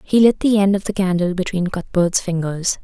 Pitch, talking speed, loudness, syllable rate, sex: 185 Hz, 210 wpm, -18 LUFS, 5.2 syllables/s, female